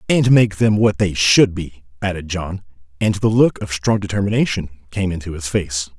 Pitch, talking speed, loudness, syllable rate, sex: 95 Hz, 190 wpm, -18 LUFS, 5.0 syllables/s, male